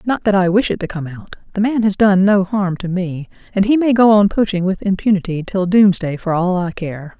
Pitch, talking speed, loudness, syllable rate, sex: 190 Hz, 250 wpm, -16 LUFS, 5.3 syllables/s, female